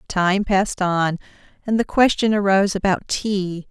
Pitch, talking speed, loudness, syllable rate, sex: 195 Hz, 145 wpm, -19 LUFS, 4.6 syllables/s, female